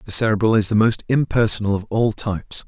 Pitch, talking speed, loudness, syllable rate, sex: 105 Hz, 200 wpm, -19 LUFS, 6.1 syllables/s, male